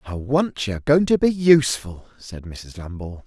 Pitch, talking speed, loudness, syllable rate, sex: 120 Hz, 200 wpm, -19 LUFS, 5.4 syllables/s, male